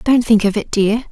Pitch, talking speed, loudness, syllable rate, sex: 220 Hz, 270 wpm, -15 LUFS, 4.8 syllables/s, female